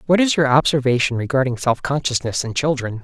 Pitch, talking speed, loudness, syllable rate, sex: 140 Hz, 180 wpm, -18 LUFS, 5.9 syllables/s, male